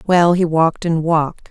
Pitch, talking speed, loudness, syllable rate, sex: 165 Hz, 200 wpm, -16 LUFS, 5.1 syllables/s, female